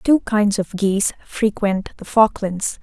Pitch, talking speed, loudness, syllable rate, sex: 205 Hz, 150 wpm, -19 LUFS, 3.9 syllables/s, female